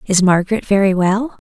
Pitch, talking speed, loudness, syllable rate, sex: 195 Hz, 160 wpm, -15 LUFS, 5.3 syllables/s, female